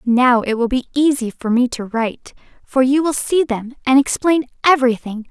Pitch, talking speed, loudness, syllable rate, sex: 255 Hz, 190 wpm, -17 LUFS, 5.1 syllables/s, female